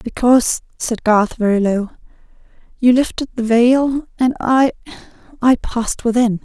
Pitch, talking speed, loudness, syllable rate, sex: 240 Hz, 120 wpm, -16 LUFS, 4.5 syllables/s, female